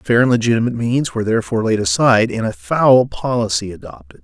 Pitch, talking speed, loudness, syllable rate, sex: 110 Hz, 185 wpm, -16 LUFS, 6.4 syllables/s, male